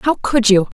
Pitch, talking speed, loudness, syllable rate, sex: 230 Hz, 230 wpm, -14 LUFS, 4.6 syllables/s, female